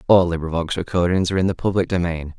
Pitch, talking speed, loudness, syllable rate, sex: 90 Hz, 200 wpm, -20 LUFS, 6.8 syllables/s, male